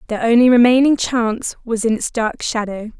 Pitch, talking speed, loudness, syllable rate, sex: 235 Hz, 180 wpm, -16 LUFS, 5.5 syllables/s, female